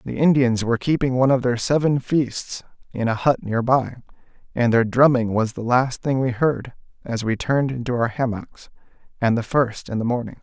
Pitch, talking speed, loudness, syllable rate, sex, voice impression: 125 Hz, 200 wpm, -21 LUFS, 5.2 syllables/s, male, very masculine, very adult-like, middle-aged, very thick, tensed, powerful, slightly bright, slightly hard, clear, fluent, slightly cool, intellectual, slightly refreshing, sincere, slightly calm, mature, slightly friendly, slightly reassuring, unique, slightly elegant, wild, lively, slightly strict, slightly intense, slightly modest